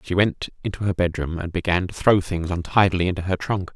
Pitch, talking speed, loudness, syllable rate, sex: 90 Hz, 225 wpm, -22 LUFS, 6.0 syllables/s, male